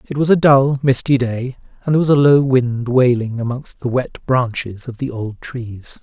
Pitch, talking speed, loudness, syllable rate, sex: 130 Hz, 210 wpm, -16 LUFS, 4.7 syllables/s, male